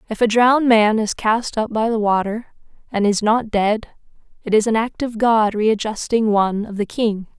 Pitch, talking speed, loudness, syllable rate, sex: 220 Hz, 205 wpm, -18 LUFS, 4.8 syllables/s, female